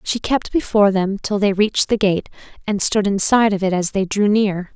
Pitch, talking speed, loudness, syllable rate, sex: 200 Hz, 225 wpm, -18 LUFS, 5.4 syllables/s, female